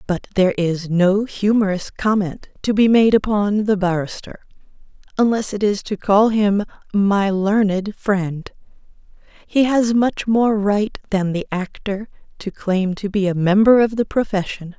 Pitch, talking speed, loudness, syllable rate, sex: 200 Hz, 150 wpm, -18 LUFS, 4.2 syllables/s, female